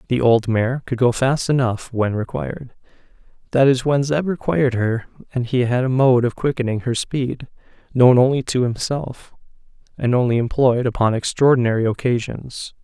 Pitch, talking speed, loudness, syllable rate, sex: 125 Hz, 150 wpm, -19 LUFS, 5.0 syllables/s, male